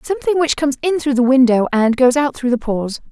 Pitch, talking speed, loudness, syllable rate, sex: 265 Hz, 250 wpm, -16 LUFS, 6.3 syllables/s, female